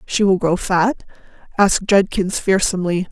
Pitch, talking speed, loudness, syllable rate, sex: 190 Hz, 135 wpm, -17 LUFS, 4.9 syllables/s, female